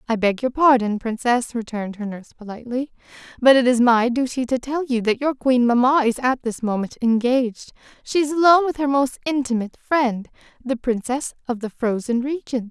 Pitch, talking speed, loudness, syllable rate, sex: 245 Hz, 190 wpm, -20 LUFS, 5.5 syllables/s, female